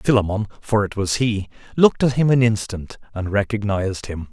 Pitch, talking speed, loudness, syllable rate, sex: 105 Hz, 180 wpm, -20 LUFS, 5.4 syllables/s, male